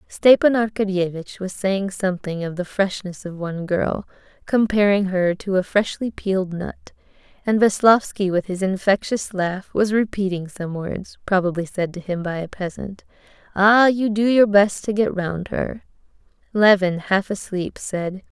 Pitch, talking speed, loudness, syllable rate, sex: 195 Hz, 155 wpm, -20 LUFS, 4.5 syllables/s, female